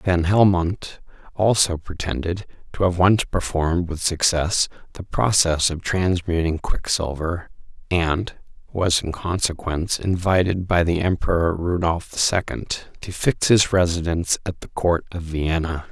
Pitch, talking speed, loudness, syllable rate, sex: 85 Hz, 130 wpm, -21 LUFS, 4.3 syllables/s, male